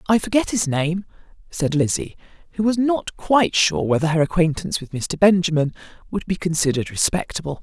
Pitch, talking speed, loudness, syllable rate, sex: 175 Hz, 165 wpm, -20 LUFS, 5.7 syllables/s, female